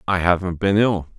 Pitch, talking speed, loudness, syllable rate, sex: 90 Hz, 205 wpm, -19 LUFS, 5.2 syllables/s, male